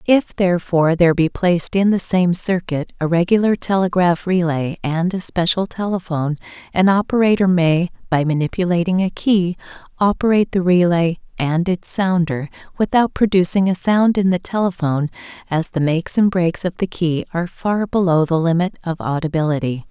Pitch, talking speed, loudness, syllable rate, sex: 175 Hz, 155 wpm, -18 LUFS, 5.2 syllables/s, female